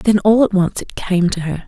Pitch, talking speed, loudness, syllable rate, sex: 195 Hz, 285 wpm, -16 LUFS, 4.9 syllables/s, female